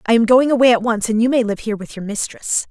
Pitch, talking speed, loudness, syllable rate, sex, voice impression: 230 Hz, 310 wpm, -17 LUFS, 6.7 syllables/s, female, feminine, slightly young, slightly clear, intellectual, calm, slightly lively